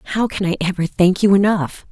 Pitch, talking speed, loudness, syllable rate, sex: 190 Hz, 220 wpm, -17 LUFS, 5.8 syllables/s, female